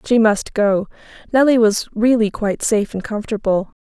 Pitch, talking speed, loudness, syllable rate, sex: 215 Hz, 155 wpm, -17 LUFS, 5.4 syllables/s, female